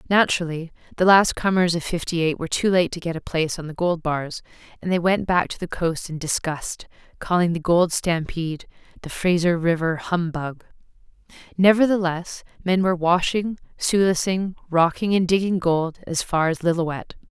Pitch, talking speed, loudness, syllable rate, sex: 175 Hz, 165 wpm, -22 LUFS, 5.0 syllables/s, female